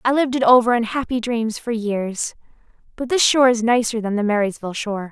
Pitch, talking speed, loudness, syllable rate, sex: 230 Hz, 210 wpm, -19 LUFS, 6.2 syllables/s, female